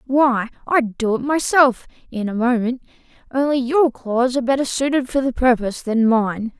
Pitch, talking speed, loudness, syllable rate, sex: 245 Hz, 175 wpm, -19 LUFS, 4.9 syllables/s, male